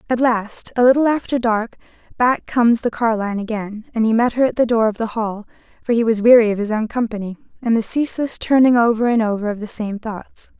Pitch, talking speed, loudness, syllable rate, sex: 225 Hz, 225 wpm, -18 LUFS, 5.9 syllables/s, female